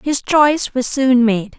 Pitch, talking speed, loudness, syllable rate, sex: 255 Hz, 190 wpm, -15 LUFS, 4.1 syllables/s, female